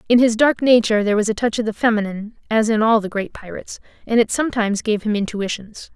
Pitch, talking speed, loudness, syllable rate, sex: 220 Hz, 230 wpm, -18 LUFS, 6.7 syllables/s, female